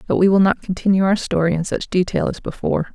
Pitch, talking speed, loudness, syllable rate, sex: 185 Hz, 245 wpm, -18 LUFS, 6.5 syllables/s, female